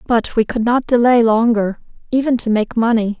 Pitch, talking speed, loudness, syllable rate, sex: 230 Hz, 190 wpm, -16 LUFS, 5.1 syllables/s, female